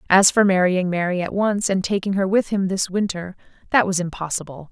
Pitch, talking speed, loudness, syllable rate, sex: 185 Hz, 205 wpm, -20 LUFS, 5.5 syllables/s, female